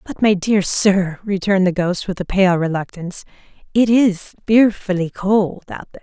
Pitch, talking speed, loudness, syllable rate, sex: 195 Hz, 170 wpm, -17 LUFS, 5.0 syllables/s, female